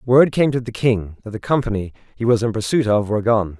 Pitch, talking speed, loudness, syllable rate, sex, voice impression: 115 Hz, 250 wpm, -19 LUFS, 5.9 syllables/s, male, very masculine, adult-like, slightly middle-aged, slightly thick, slightly tensed, slightly weak, bright, soft, clear, very fluent, cool, very intellectual, very refreshing, very sincere, calm, slightly mature, very friendly, very reassuring, unique, very elegant, wild, very sweet, lively, very kind, slightly modest